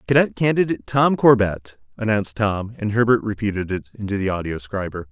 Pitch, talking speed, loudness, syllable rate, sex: 105 Hz, 155 wpm, -20 LUFS, 5.9 syllables/s, male